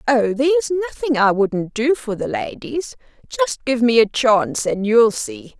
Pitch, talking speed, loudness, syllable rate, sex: 240 Hz, 195 wpm, -18 LUFS, 4.8 syllables/s, female